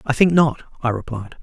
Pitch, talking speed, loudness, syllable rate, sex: 135 Hz, 210 wpm, -19 LUFS, 5.5 syllables/s, male